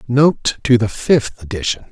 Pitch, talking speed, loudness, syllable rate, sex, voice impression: 120 Hz, 155 wpm, -16 LUFS, 4.2 syllables/s, male, masculine, middle-aged, thick, tensed, powerful, hard, slightly halting, raspy, intellectual, mature, slightly friendly, unique, wild, lively, slightly strict